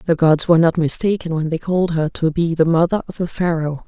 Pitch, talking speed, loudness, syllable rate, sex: 165 Hz, 250 wpm, -17 LUFS, 6.1 syllables/s, female